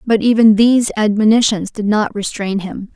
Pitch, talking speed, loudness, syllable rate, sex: 215 Hz, 160 wpm, -14 LUFS, 5.0 syllables/s, female